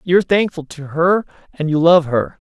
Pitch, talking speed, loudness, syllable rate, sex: 165 Hz, 195 wpm, -16 LUFS, 4.9 syllables/s, male